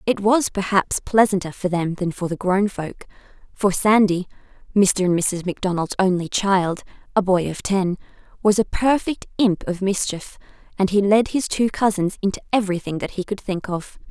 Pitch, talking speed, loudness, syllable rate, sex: 195 Hz, 180 wpm, -21 LUFS, 5.0 syllables/s, female